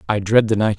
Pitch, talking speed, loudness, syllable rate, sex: 105 Hz, 305 wpm, -17 LUFS, 6.4 syllables/s, male